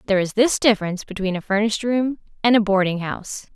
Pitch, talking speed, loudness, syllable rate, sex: 210 Hz, 185 wpm, -20 LUFS, 6.8 syllables/s, female